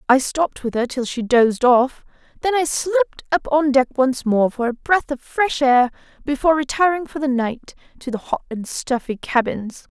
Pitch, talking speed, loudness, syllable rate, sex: 270 Hz, 200 wpm, -19 LUFS, 5.0 syllables/s, female